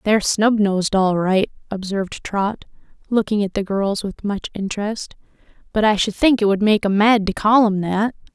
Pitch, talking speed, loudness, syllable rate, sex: 205 Hz, 185 wpm, -19 LUFS, 5.0 syllables/s, female